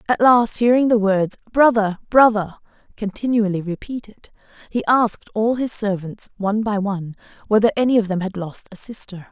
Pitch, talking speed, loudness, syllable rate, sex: 215 Hz, 160 wpm, -19 LUFS, 5.3 syllables/s, female